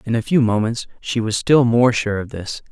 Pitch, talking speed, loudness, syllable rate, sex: 115 Hz, 245 wpm, -18 LUFS, 4.9 syllables/s, male